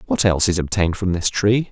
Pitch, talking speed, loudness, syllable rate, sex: 95 Hz, 245 wpm, -19 LUFS, 6.5 syllables/s, male